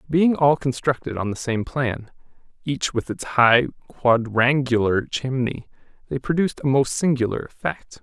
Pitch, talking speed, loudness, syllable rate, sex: 130 Hz, 140 wpm, -21 LUFS, 4.5 syllables/s, male